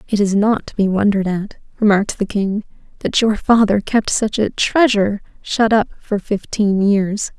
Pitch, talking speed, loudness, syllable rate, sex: 205 Hz, 180 wpm, -17 LUFS, 4.8 syllables/s, female